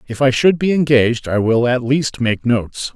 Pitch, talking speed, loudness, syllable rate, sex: 125 Hz, 225 wpm, -16 LUFS, 5.0 syllables/s, male